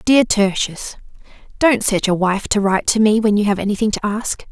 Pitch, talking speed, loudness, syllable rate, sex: 210 Hz, 200 wpm, -17 LUFS, 5.4 syllables/s, female